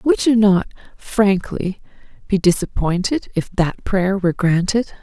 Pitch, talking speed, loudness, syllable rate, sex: 195 Hz, 130 wpm, -18 LUFS, 4.1 syllables/s, female